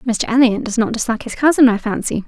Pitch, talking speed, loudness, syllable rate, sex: 235 Hz, 235 wpm, -16 LUFS, 6.3 syllables/s, female